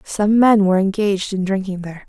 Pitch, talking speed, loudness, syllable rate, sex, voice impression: 195 Hz, 200 wpm, -17 LUFS, 6.2 syllables/s, female, feminine, slightly adult-like, slightly soft, muffled, slightly cute, calm, friendly, slightly sweet, slightly kind